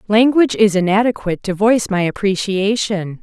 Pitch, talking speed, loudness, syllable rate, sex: 205 Hz, 130 wpm, -16 LUFS, 5.5 syllables/s, female